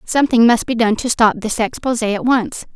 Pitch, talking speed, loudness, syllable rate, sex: 235 Hz, 220 wpm, -16 LUFS, 5.5 syllables/s, female